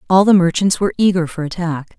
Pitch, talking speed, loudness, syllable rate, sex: 180 Hz, 210 wpm, -16 LUFS, 6.7 syllables/s, female